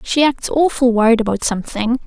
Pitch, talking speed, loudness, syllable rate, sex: 245 Hz, 175 wpm, -16 LUFS, 6.3 syllables/s, female